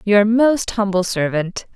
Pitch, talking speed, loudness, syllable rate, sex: 205 Hz, 135 wpm, -17 LUFS, 3.7 syllables/s, female